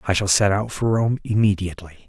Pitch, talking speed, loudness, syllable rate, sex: 100 Hz, 200 wpm, -20 LUFS, 6.2 syllables/s, male